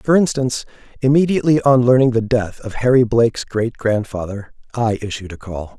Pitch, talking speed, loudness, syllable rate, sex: 120 Hz, 165 wpm, -17 LUFS, 5.4 syllables/s, male